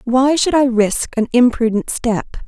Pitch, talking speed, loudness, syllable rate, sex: 240 Hz, 170 wpm, -16 LUFS, 4.2 syllables/s, female